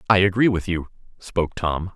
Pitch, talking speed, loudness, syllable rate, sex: 95 Hz, 185 wpm, -22 LUFS, 5.3 syllables/s, male